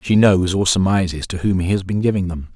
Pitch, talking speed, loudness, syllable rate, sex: 95 Hz, 260 wpm, -18 LUFS, 5.8 syllables/s, male